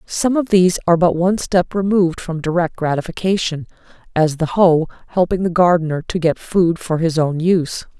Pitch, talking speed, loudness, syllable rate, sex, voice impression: 175 Hz, 180 wpm, -17 LUFS, 5.5 syllables/s, female, very feminine, very adult-like, thin, tensed, slightly powerful, slightly bright, slightly soft, clear, fluent, cute, very intellectual, refreshing, sincere, very calm, friendly, reassuring, slightly unique, very elegant, very sweet, slightly lively, very kind, modest, light